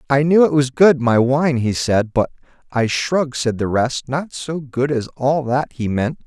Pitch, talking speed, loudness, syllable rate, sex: 135 Hz, 220 wpm, -18 LUFS, 4.1 syllables/s, male